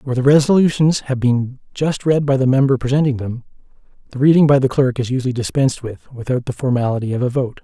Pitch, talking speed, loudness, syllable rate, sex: 130 Hz, 210 wpm, -17 LUFS, 6.5 syllables/s, male